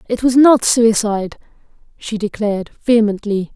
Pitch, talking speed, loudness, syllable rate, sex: 220 Hz, 120 wpm, -15 LUFS, 5.2 syllables/s, female